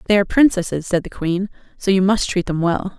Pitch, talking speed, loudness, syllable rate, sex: 190 Hz, 240 wpm, -18 LUFS, 5.9 syllables/s, female